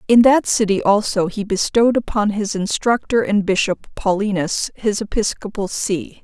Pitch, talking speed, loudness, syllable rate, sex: 210 Hz, 145 wpm, -18 LUFS, 4.7 syllables/s, female